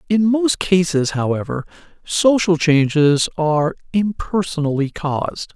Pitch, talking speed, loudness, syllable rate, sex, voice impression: 170 Hz, 95 wpm, -18 LUFS, 4.2 syllables/s, male, masculine, middle-aged, powerful, slightly hard, fluent, slightly intellectual, slightly mature, wild, lively, slightly strict